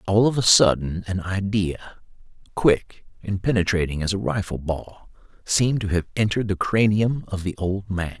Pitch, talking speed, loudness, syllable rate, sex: 100 Hz, 170 wpm, -22 LUFS, 4.9 syllables/s, male